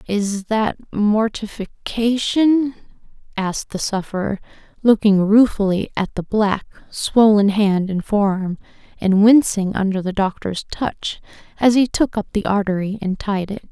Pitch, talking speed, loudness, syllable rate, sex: 205 Hz, 135 wpm, -18 LUFS, 4.1 syllables/s, female